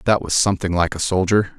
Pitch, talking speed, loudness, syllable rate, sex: 95 Hz, 230 wpm, -19 LUFS, 6.3 syllables/s, male